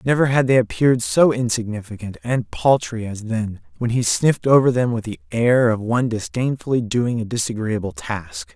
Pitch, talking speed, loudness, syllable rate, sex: 115 Hz, 175 wpm, -20 LUFS, 5.2 syllables/s, male